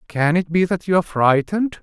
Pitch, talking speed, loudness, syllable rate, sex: 170 Hz, 195 wpm, -18 LUFS, 5.4 syllables/s, male